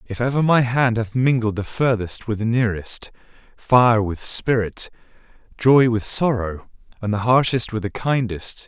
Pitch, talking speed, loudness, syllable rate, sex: 115 Hz, 160 wpm, -20 LUFS, 4.5 syllables/s, male